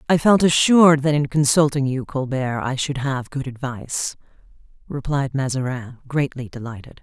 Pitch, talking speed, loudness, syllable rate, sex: 135 Hz, 145 wpm, -20 LUFS, 5.0 syllables/s, female